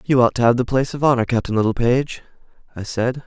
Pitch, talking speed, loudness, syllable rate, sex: 120 Hz, 220 wpm, -19 LUFS, 6.8 syllables/s, male